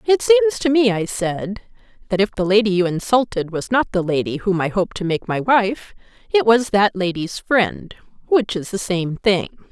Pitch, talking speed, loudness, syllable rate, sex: 205 Hz, 205 wpm, -19 LUFS, 4.6 syllables/s, female